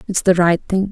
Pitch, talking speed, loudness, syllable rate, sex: 185 Hz, 265 wpm, -16 LUFS, 5.3 syllables/s, female